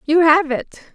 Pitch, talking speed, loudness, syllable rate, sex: 310 Hz, 190 wpm, -16 LUFS, 5.2 syllables/s, female